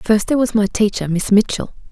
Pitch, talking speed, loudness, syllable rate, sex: 210 Hz, 220 wpm, -17 LUFS, 5.8 syllables/s, female